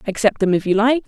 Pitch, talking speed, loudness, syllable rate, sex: 220 Hz, 280 wpm, -17 LUFS, 6.6 syllables/s, female